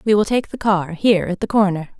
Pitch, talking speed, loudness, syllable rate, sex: 200 Hz, 270 wpm, -18 LUFS, 6.0 syllables/s, female